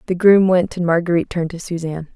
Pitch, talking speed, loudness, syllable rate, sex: 175 Hz, 225 wpm, -17 LUFS, 7.2 syllables/s, female